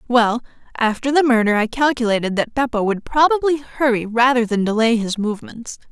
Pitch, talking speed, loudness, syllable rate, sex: 240 Hz, 160 wpm, -18 LUFS, 5.5 syllables/s, female